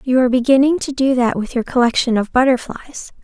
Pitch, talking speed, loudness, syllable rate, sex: 255 Hz, 205 wpm, -16 LUFS, 6.7 syllables/s, female